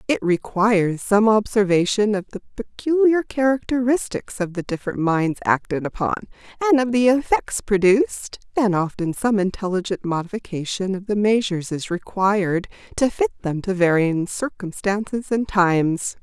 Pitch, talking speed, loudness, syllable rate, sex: 205 Hz, 135 wpm, -21 LUFS, 4.9 syllables/s, female